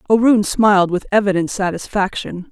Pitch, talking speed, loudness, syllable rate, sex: 200 Hz, 120 wpm, -16 LUFS, 5.3 syllables/s, female